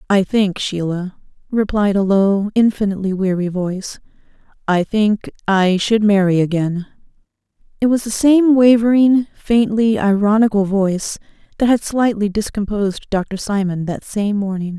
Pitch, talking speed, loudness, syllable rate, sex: 205 Hz, 130 wpm, -16 LUFS, 4.6 syllables/s, female